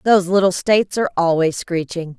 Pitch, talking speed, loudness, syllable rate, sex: 180 Hz, 165 wpm, -18 LUFS, 6.0 syllables/s, female